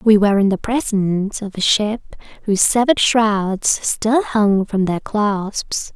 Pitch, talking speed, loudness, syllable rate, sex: 205 Hz, 160 wpm, -17 LUFS, 3.9 syllables/s, female